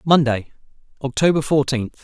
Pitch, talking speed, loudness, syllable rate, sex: 135 Hz, 90 wpm, -19 LUFS, 5.0 syllables/s, male